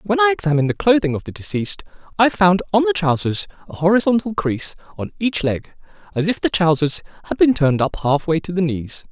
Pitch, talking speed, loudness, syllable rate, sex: 180 Hz, 205 wpm, -18 LUFS, 6.2 syllables/s, male